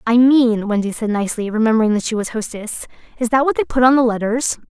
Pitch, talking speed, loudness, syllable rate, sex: 230 Hz, 230 wpm, -17 LUFS, 6.2 syllables/s, female